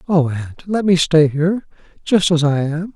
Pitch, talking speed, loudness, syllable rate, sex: 165 Hz, 180 wpm, -17 LUFS, 4.6 syllables/s, male